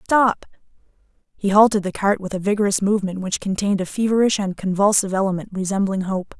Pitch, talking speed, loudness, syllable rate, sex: 195 Hz, 170 wpm, -20 LUFS, 6.3 syllables/s, female